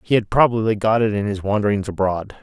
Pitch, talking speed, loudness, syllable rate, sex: 105 Hz, 225 wpm, -19 LUFS, 6.1 syllables/s, male